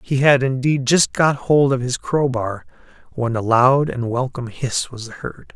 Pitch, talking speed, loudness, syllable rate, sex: 125 Hz, 185 wpm, -18 LUFS, 4.2 syllables/s, male